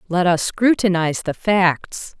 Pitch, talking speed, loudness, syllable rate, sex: 180 Hz, 135 wpm, -18 LUFS, 4.1 syllables/s, female